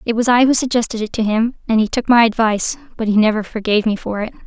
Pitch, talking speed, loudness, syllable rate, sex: 225 Hz, 270 wpm, -16 LUFS, 6.9 syllables/s, female